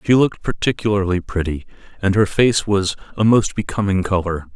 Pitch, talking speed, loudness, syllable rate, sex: 100 Hz, 160 wpm, -18 LUFS, 5.6 syllables/s, male